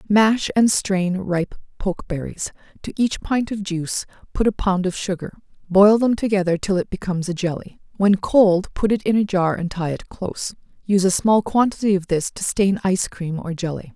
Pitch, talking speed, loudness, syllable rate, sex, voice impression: 190 Hz, 200 wpm, -20 LUFS, 5.2 syllables/s, female, very feminine, adult-like, slightly intellectual, calm